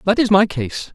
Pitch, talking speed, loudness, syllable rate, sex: 195 Hz, 255 wpm, -17 LUFS, 4.4 syllables/s, male